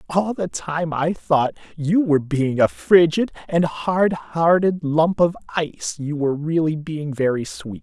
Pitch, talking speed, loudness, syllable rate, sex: 160 Hz, 170 wpm, -20 LUFS, 4.1 syllables/s, male